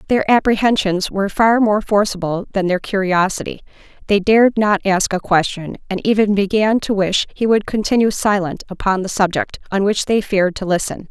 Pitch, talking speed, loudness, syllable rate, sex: 200 Hz, 180 wpm, -17 LUFS, 5.3 syllables/s, female